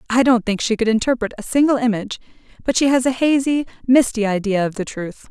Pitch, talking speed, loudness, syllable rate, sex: 235 Hz, 215 wpm, -18 LUFS, 6.1 syllables/s, female